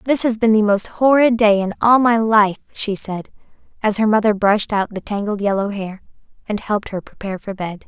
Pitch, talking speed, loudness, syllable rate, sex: 210 Hz, 215 wpm, -17 LUFS, 5.6 syllables/s, female